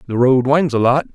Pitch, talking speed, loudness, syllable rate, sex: 130 Hz, 260 wpm, -15 LUFS, 5.6 syllables/s, male